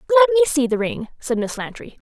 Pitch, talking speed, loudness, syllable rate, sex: 290 Hz, 230 wpm, -19 LUFS, 7.0 syllables/s, female